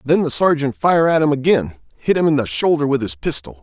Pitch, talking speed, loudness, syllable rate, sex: 135 Hz, 250 wpm, -17 LUFS, 5.7 syllables/s, male